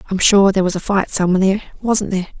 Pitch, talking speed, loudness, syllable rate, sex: 195 Hz, 225 wpm, -16 LUFS, 7.5 syllables/s, female